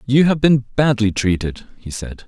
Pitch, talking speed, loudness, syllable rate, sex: 120 Hz, 185 wpm, -17 LUFS, 4.5 syllables/s, male